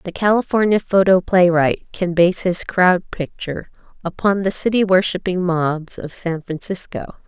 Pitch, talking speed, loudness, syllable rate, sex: 180 Hz, 140 wpm, -18 LUFS, 4.5 syllables/s, female